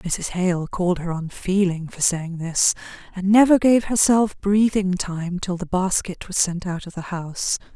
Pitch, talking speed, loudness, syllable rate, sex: 185 Hz, 180 wpm, -21 LUFS, 4.3 syllables/s, female